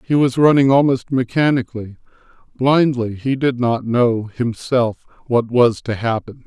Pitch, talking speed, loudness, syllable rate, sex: 125 Hz, 140 wpm, -17 LUFS, 4.4 syllables/s, male